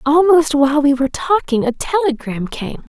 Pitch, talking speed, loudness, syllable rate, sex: 290 Hz, 165 wpm, -16 LUFS, 5.1 syllables/s, female